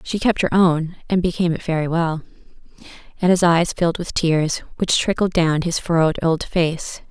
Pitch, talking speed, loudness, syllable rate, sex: 170 Hz, 185 wpm, -19 LUFS, 5.2 syllables/s, female